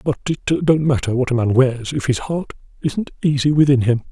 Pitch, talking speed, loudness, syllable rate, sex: 135 Hz, 220 wpm, -18 LUFS, 5.1 syllables/s, male